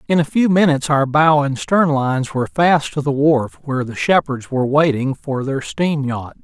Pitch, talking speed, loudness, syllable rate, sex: 145 Hz, 215 wpm, -17 LUFS, 5.1 syllables/s, male